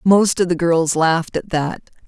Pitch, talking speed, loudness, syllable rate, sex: 170 Hz, 205 wpm, -17 LUFS, 4.4 syllables/s, female